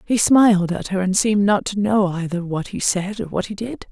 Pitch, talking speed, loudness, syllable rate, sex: 200 Hz, 260 wpm, -19 LUFS, 5.3 syllables/s, female